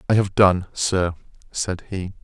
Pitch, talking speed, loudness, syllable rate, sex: 90 Hz, 160 wpm, -21 LUFS, 3.9 syllables/s, male